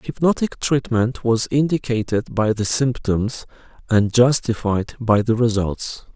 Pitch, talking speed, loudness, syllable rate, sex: 115 Hz, 125 wpm, -20 LUFS, 4.2 syllables/s, male